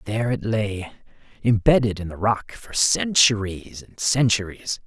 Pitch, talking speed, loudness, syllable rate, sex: 105 Hz, 135 wpm, -21 LUFS, 4.3 syllables/s, male